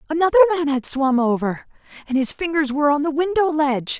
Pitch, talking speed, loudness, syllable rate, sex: 295 Hz, 195 wpm, -19 LUFS, 6.4 syllables/s, female